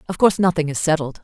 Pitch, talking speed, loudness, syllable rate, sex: 165 Hz, 240 wpm, -19 LUFS, 7.6 syllables/s, female